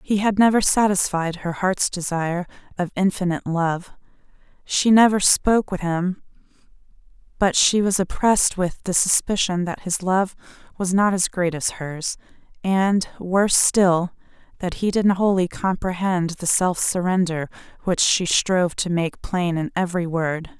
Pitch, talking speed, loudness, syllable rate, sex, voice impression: 185 Hz, 150 wpm, -20 LUFS, 4.5 syllables/s, female, feminine, adult-like, tensed, slightly dark, slightly hard, fluent, intellectual, calm, elegant, sharp